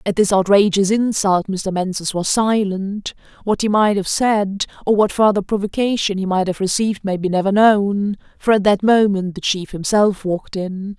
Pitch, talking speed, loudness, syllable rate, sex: 200 Hz, 185 wpm, -17 LUFS, 4.8 syllables/s, female